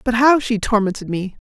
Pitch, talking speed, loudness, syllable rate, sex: 220 Hz, 205 wpm, -18 LUFS, 5.4 syllables/s, female